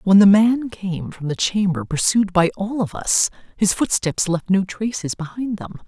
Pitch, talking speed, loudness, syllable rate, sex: 195 Hz, 195 wpm, -19 LUFS, 4.4 syllables/s, female